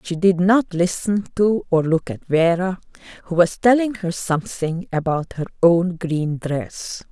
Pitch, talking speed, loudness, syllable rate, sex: 175 Hz, 160 wpm, -20 LUFS, 4.0 syllables/s, female